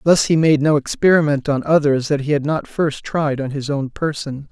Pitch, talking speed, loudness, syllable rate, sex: 145 Hz, 225 wpm, -18 LUFS, 5.0 syllables/s, male